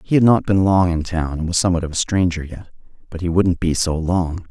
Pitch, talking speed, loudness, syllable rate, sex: 85 Hz, 265 wpm, -18 LUFS, 5.8 syllables/s, male